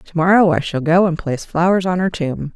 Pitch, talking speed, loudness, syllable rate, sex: 170 Hz, 260 wpm, -16 LUFS, 5.6 syllables/s, female